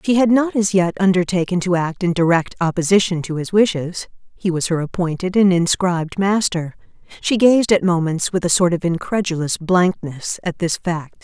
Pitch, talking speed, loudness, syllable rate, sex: 180 Hz, 180 wpm, -18 LUFS, 5.0 syllables/s, female